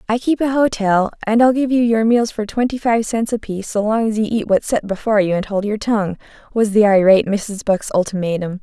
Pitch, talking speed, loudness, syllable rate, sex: 215 Hz, 235 wpm, -17 LUFS, 5.8 syllables/s, female